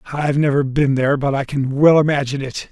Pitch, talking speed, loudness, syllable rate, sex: 140 Hz, 245 wpm, -17 LUFS, 6.6 syllables/s, male